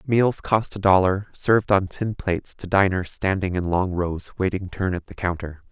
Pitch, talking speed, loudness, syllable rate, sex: 95 Hz, 200 wpm, -23 LUFS, 4.7 syllables/s, male